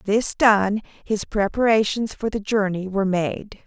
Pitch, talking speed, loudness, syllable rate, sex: 205 Hz, 150 wpm, -21 LUFS, 4.0 syllables/s, female